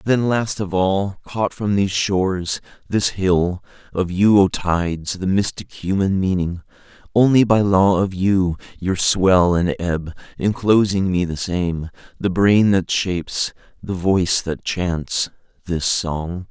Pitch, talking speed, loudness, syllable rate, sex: 95 Hz, 150 wpm, -19 LUFS, 3.8 syllables/s, male